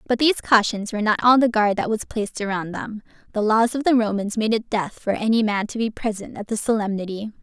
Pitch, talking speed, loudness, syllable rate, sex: 215 Hz, 240 wpm, -21 LUFS, 6.1 syllables/s, female